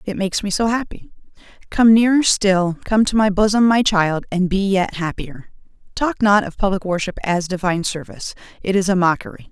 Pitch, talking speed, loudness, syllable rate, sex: 195 Hz, 175 wpm, -18 LUFS, 5.2 syllables/s, female